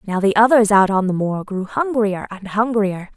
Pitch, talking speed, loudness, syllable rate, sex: 205 Hz, 210 wpm, -17 LUFS, 4.8 syllables/s, female